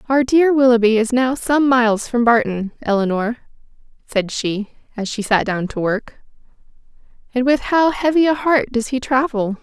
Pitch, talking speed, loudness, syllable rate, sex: 245 Hz, 170 wpm, -17 LUFS, 4.8 syllables/s, female